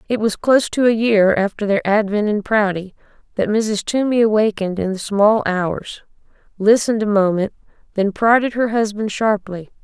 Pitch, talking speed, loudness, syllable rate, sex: 210 Hz, 165 wpm, -17 LUFS, 5.0 syllables/s, female